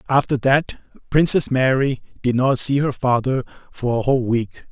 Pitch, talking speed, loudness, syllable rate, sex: 130 Hz, 165 wpm, -19 LUFS, 4.8 syllables/s, male